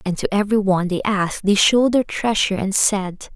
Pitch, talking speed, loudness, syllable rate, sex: 200 Hz, 215 wpm, -18 LUFS, 6.0 syllables/s, female